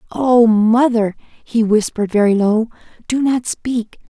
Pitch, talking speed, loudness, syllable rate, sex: 225 Hz, 130 wpm, -16 LUFS, 4.1 syllables/s, female